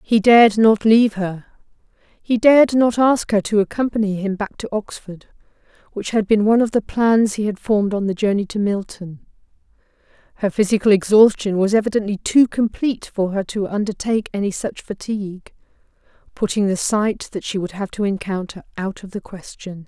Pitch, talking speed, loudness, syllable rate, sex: 205 Hz, 170 wpm, -18 LUFS, 5.4 syllables/s, female